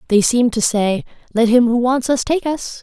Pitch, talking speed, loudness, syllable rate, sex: 240 Hz, 235 wpm, -16 LUFS, 5.1 syllables/s, female